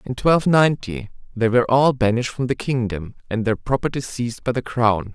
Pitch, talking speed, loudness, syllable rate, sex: 120 Hz, 200 wpm, -20 LUFS, 5.8 syllables/s, male